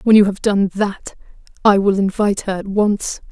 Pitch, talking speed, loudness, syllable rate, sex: 200 Hz, 200 wpm, -17 LUFS, 5.0 syllables/s, female